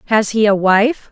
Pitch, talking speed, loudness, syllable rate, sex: 215 Hz, 215 wpm, -14 LUFS, 4.5 syllables/s, female